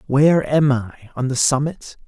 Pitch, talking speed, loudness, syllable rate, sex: 140 Hz, 145 wpm, -18 LUFS, 5.0 syllables/s, male